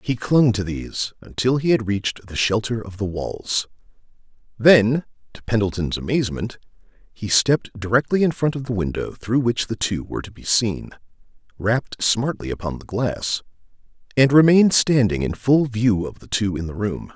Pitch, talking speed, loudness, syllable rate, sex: 110 Hz, 175 wpm, -21 LUFS, 5.1 syllables/s, male